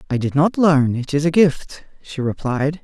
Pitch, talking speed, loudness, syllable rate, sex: 150 Hz, 210 wpm, -18 LUFS, 4.5 syllables/s, female